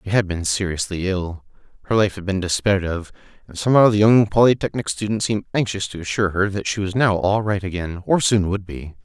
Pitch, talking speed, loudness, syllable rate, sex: 100 Hz, 220 wpm, -20 LUFS, 6.0 syllables/s, male